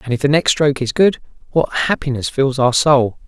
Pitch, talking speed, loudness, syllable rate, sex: 140 Hz, 220 wpm, -16 LUFS, 5.4 syllables/s, male